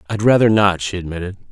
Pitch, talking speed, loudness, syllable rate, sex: 95 Hz, 200 wpm, -16 LUFS, 6.7 syllables/s, male